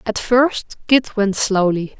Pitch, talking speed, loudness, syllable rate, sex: 215 Hz, 150 wpm, -17 LUFS, 3.4 syllables/s, female